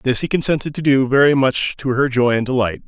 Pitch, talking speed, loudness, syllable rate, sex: 130 Hz, 250 wpm, -17 LUFS, 5.8 syllables/s, male